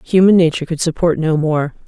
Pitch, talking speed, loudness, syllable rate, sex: 165 Hz, 190 wpm, -15 LUFS, 6.0 syllables/s, female